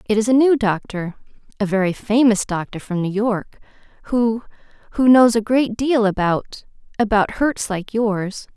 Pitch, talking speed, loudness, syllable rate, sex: 220 Hz, 140 wpm, -19 LUFS, 4.5 syllables/s, female